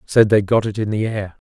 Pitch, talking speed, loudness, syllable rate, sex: 105 Hz, 285 wpm, -18 LUFS, 5.3 syllables/s, male